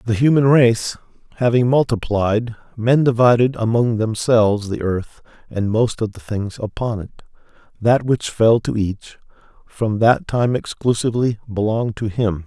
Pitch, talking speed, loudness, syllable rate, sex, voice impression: 115 Hz, 145 wpm, -18 LUFS, 4.4 syllables/s, male, very masculine, very adult-like, old, thick, very relaxed, very weak, dark, very soft, muffled, slightly halting, very raspy, very cool, intellectual, sincere, very calm, friendly, reassuring, very unique, elegant, very wild, sweet, slightly lively, very kind, modest, slightly light